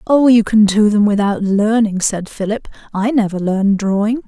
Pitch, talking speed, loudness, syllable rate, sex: 210 Hz, 180 wpm, -15 LUFS, 4.9 syllables/s, female